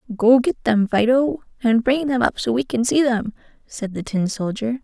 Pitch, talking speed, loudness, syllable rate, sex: 240 Hz, 210 wpm, -19 LUFS, 4.8 syllables/s, female